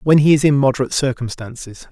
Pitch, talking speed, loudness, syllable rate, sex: 135 Hz, 190 wpm, -16 LUFS, 6.4 syllables/s, male